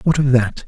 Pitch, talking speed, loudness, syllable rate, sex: 125 Hz, 265 wpm, -16 LUFS, 5.3 syllables/s, male